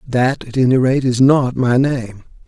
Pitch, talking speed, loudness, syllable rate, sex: 130 Hz, 195 wpm, -15 LUFS, 4.2 syllables/s, male